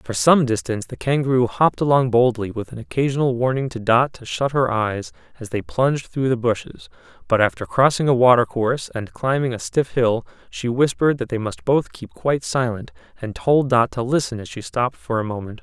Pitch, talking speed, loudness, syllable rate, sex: 120 Hz, 205 wpm, -20 LUFS, 5.6 syllables/s, male